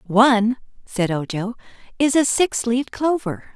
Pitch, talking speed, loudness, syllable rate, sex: 235 Hz, 135 wpm, -20 LUFS, 4.4 syllables/s, female